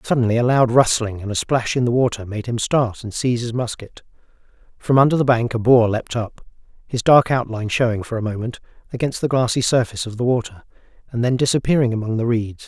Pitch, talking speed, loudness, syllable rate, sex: 120 Hz, 210 wpm, -19 LUFS, 6.1 syllables/s, male